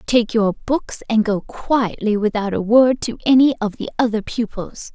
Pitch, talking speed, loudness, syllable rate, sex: 225 Hz, 180 wpm, -18 LUFS, 4.6 syllables/s, female